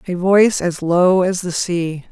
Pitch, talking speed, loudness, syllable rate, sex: 180 Hz, 200 wpm, -16 LUFS, 4.2 syllables/s, female